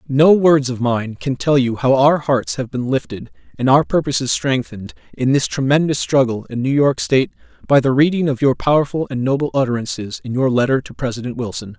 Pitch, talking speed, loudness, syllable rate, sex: 135 Hz, 205 wpm, -17 LUFS, 5.6 syllables/s, male